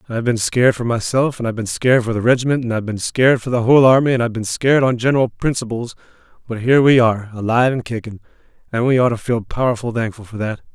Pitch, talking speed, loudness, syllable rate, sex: 120 Hz, 240 wpm, -17 LUFS, 7.3 syllables/s, male